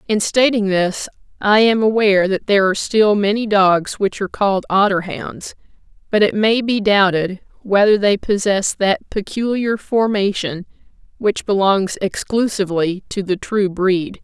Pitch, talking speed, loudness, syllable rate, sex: 200 Hz, 150 wpm, -17 LUFS, 4.5 syllables/s, female